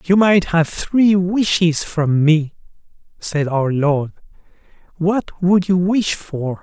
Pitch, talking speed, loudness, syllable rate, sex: 175 Hz, 145 wpm, -17 LUFS, 3.4 syllables/s, male